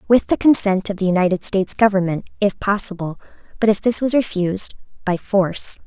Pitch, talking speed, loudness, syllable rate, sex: 200 Hz, 175 wpm, -18 LUFS, 5.9 syllables/s, female